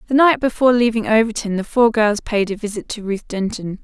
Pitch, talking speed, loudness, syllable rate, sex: 220 Hz, 220 wpm, -18 LUFS, 5.8 syllables/s, female